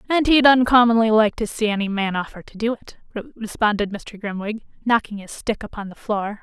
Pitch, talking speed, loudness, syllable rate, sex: 220 Hz, 195 wpm, -20 LUFS, 5.7 syllables/s, female